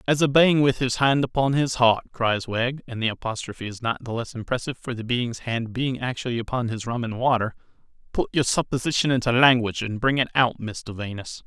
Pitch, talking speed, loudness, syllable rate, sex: 120 Hz, 215 wpm, -23 LUFS, 5.7 syllables/s, male